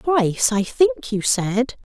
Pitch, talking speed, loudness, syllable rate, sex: 240 Hz, 155 wpm, -20 LUFS, 3.5 syllables/s, female